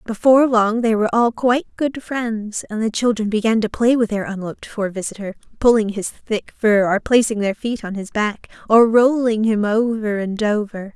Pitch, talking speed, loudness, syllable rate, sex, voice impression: 220 Hz, 195 wpm, -18 LUFS, 5.0 syllables/s, female, feminine, slightly adult-like, slightly muffled, slightly cute, sincere, slightly calm, slightly unique, slightly kind